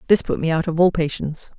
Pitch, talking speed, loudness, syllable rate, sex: 165 Hz, 265 wpm, -20 LUFS, 6.8 syllables/s, female